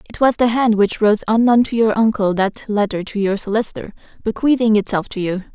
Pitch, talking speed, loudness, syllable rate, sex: 215 Hz, 205 wpm, -17 LUFS, 5.9 syllables/s, female